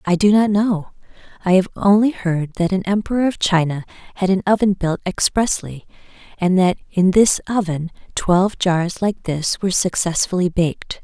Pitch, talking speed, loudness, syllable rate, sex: 185 Hz, 165 wpm, -18 LUFS, 5.0 syllables/s, female